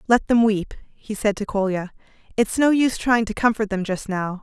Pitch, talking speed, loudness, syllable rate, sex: 215 Hz, 215 wpm, -21 LUFS, 5.2 syllables/s, female